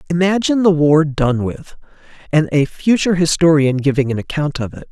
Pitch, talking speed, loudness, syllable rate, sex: 155 Hz, 170 wpm, -15 LUFS, 5.6 syllables/s, male